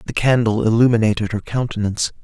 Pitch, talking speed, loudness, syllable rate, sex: 110 Hz, 135 wpm, -18 LUFS, 6.6 syllables/s, male